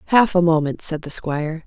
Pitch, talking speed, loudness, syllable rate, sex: 165 Hz, 215 wpm, -20 LUFS, 5.6 syllables/s, female